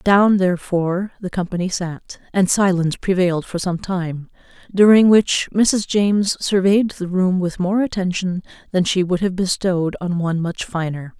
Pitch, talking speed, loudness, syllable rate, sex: 185 Hz, 160 wpm, -18 LUFS, 4.7 syllables/s, female